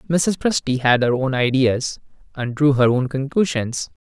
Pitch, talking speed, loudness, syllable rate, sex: 135 Hz, 165 wpm, -19 LUFS, 4.4 syllables/s, male